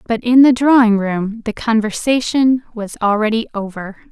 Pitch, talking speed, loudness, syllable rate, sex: 225 Hz, 145 wpm, -15 LUFS, 4.6 syllables/s, female